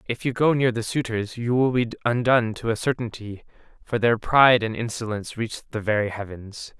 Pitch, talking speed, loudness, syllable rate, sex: 115 Hz, 195 wpm, -23 LUFS, 5.4 syllables/s, male